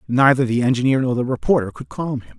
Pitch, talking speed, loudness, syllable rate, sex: 125 Hz, 225 wpm, -19 LUFS, 6.4 syllables/s, male